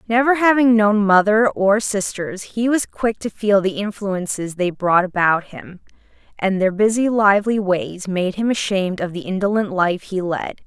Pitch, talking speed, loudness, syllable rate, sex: 200 Hz, 175 wpm, -18 LUFS, 4.6 syllables/s, female